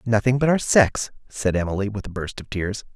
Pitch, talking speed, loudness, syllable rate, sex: 110 Hz, 225 wpm, -22 LUFS, 5.4 syllables/s, male